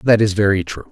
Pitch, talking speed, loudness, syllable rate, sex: 100 Hz, 260 wpm, -16 LUFS, 5.9 syllables/s, male